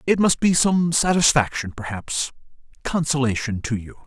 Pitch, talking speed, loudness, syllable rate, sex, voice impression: 140 Hz, 135 wpm, -21 LUFS, 4.8 syllables/s, male, very masculine, gender-neutral, slightly powerful, slightly hard, cool, mature, slightly unique, wild, slightly lively, slightly strict